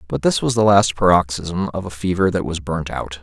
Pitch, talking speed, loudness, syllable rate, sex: 90 Hz, 240 wpm, -18 LUFS, 5.2 syllables/s, male